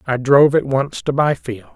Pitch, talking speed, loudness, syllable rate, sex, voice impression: 135 Hz, 205 wpm, -16 LUFS, 5.1 syllables/s, male, masculine, slightly old, slightly muffled, slightly raspy, slightly calm, slightly mature